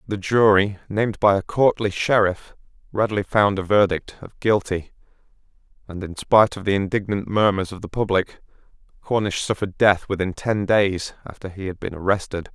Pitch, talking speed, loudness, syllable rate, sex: 100 Hz, 165 wpm, -21 LUFS, 5.3 syllables/s, male